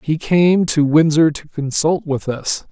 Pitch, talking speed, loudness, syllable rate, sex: 155 Hz, 175 wpm, -16 LUFS, 3.9 syllables/s, male